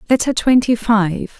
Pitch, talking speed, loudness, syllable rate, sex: 225 Hz, 130 wpm, -15 LUFS, 4.3 syllables/s, female